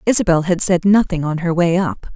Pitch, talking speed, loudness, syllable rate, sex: 175 Hz, 225 wpm, -16 LUFS, 5.5 syllables/s, female